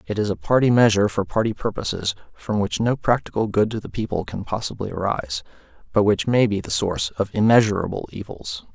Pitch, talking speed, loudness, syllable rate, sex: 100 Hz, 190 wpm, -22 LUFS, 6.0 syllables/s, male